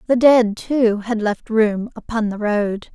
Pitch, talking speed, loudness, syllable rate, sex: 220 Hz, 185 wpm, -18 LUFS, 3.8 syllables/s, female